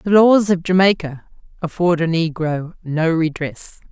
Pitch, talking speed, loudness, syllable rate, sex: 170 Hz, 140 wpm, -17 LUFS, 4.1 syllables/s, female